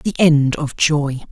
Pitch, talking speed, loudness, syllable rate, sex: 150 Hz, 180 wpm, -16 LUFS, 3.6 syllables/s, male